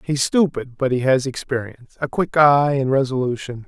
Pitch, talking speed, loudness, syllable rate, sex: 135 Hz, 180 wpm, -19 LUFS, 5.1 syllables/s, male